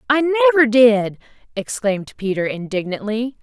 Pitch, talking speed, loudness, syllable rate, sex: 225 Hz, 105 wpm, -18 LUFS, 5.1 syllables/s, female